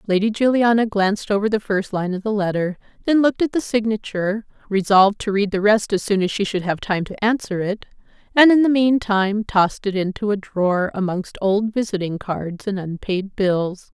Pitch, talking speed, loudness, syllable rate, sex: 205 Hz, 195 wpm, -20 LUFS, 5.4 syllables/s, female